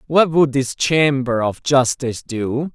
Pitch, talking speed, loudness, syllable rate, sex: 135 Hz, 155 wpm, -18 LUFS, 3.9 syllables/s, male